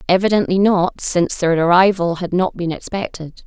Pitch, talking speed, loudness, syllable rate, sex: 180 Hz, 155 wpm, -17 LUFS, 5.1 syllables/s, female